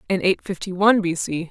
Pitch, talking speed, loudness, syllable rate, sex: 185 Hz, 240 wpm, -20 LUFS, 6.0 syllables/s, female